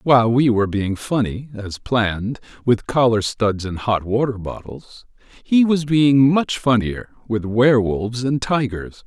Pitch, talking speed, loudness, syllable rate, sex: 115 Hz, 150 wpm, -19 LUFS, 4.2 syllables/s, male